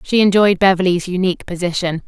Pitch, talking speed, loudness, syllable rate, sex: 185 Hz, 145 wpm, -16 LUFS, 6.1 syllables/s, female